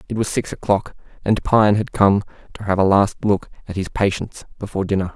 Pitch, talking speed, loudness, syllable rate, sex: 100 Hz, 210 wpm, -19 LUFS, 5.6 syllables/s, male